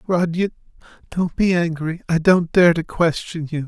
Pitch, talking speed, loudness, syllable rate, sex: 170 Hz, 165 wpm, -19 LUFS, 4.6 syllables/s, male